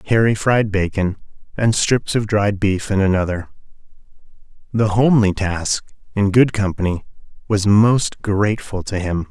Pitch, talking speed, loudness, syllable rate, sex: 100 Hz, 135 wpm, -18 LUFS, 4.5 syllables/s, male